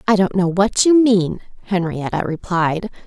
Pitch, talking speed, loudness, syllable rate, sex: 195 Hz, 155 wpm, -17 LUFS, 4.5 syllables/s, female